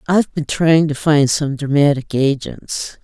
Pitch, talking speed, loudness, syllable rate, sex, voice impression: 145 Hz, 160 wpm, -16 LUFS, 4.2 syllables/s, female, feminine, very adult-like, intellectual, calm, slightly elegant